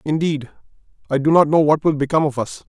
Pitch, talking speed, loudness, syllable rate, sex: 150 Hz, 195 wpm, -18 LUFS, 6.1 syllables/s, male